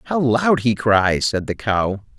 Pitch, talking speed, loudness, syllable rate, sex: 115 Hz, 195 wpm, -18 LUFS, 3.7 syllables/s, male